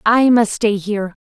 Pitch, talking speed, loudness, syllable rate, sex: 215 Hz, 195 wpm, -16 LUFS, 4.7 syllables/s, female